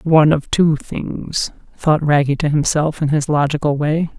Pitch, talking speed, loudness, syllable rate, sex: 150 Hz, 170 wpm, -17 LUFS, 4.4 syllables/s, female